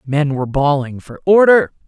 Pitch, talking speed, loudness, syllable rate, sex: 150 Hz, 160 wpm, -14 LUFS, 4.9 syllables/s, male